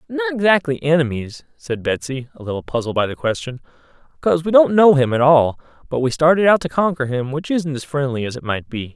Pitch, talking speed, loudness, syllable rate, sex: 145 Hz, 220 wpm, -18 LUFS, 5.9 syllables/s, male